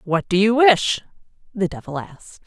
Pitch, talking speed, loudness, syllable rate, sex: 195 Hz, 170 wpm, -19 LUFS, 4.9 syllables/s, female